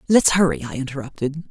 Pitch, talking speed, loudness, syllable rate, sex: 145 Hz, 160 wpm, -20 LUFS, 6.0 syllables/s, female